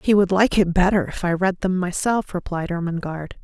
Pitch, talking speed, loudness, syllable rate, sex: 185 Hz, 210 wpm, -21 LUFS, 5.4 syllables/s, female